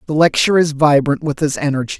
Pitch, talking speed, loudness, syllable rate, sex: 150 Hz, 210 wpm, -15 LUFS, 6.6 syllables/s, male